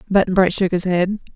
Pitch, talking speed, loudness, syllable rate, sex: 185 Hz, 220 wpm, -18 LUFS, 5.8 syllables/s, female